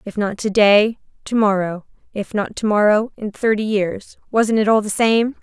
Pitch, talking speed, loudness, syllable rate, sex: 210 Hz, 165 wpm, -18 LUFS, 4.6 syllables/s, female